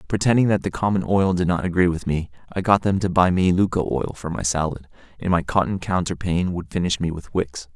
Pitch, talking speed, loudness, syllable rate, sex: 90 Hz, 230 wpm, -22 LUFS, 5.9 syllables/s, male